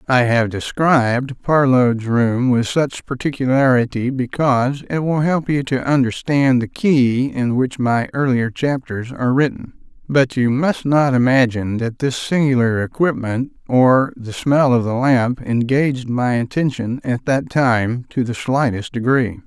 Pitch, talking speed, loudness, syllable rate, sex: 130 Hz, 150 wpm, -17 LUFS, 4.2 syllables/s, male